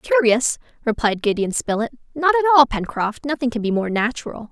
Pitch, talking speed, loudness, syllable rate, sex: 240 Hz, 175 wpm, -19 LUFS, 5.6 syllables/s, female